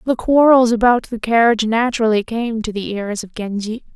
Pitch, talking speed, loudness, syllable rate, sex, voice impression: 225 Hz, 180 wpm, -16 LUFS, 5.4 syllables/s, female, very feminine, young, very thin, slightly tensed, slightly weak, slightly dark, soft, very clear, very fluent, very cute, intellectual, very refreshing, very sincere, calm, very friendly, very reassuring, unique, very elegant, very sweet, lively, very kind, modest